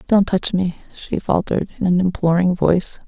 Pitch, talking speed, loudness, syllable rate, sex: 180 Hz, 175 wpm, -19 LUFS, 5.8 syllables/s, female